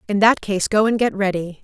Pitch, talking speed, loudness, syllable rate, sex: 205 Hz, 260 wpm, -18 LUFS, 5.4 syllables/s, female